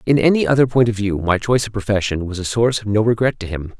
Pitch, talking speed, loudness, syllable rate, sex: 110 Hz, 285 wpm, -18 LUFS, 6.9 syllables/s, male